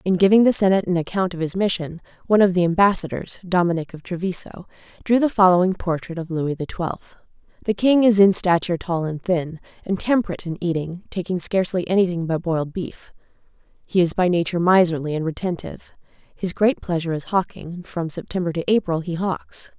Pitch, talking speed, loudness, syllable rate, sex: 180 Hz, 180 wpm, -21 LUFS, 5.9 syllables/s, female